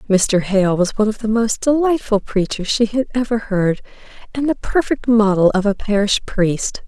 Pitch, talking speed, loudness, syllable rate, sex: 215 Hz, 185 wpm, -17 LUFS, 4.8 syllables/s, female